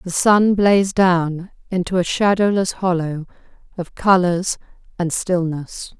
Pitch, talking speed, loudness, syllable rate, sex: 180 Hz, 120 wpm, -18 LUFS, 3.9 syllables/s, female